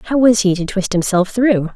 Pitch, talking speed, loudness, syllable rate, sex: 205 Hz, 240 wpm, -15 LUFS, 5.2 syllables/s, female